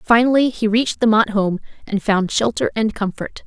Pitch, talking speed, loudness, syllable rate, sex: 220 Hz, 190 wpm, -18 LUFS, 5.1 syllables/s, female